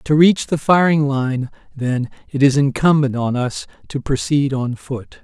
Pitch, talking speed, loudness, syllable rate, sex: 140 Hz, 170 wpm, -18 LUFS, 4.2 syllables/s, male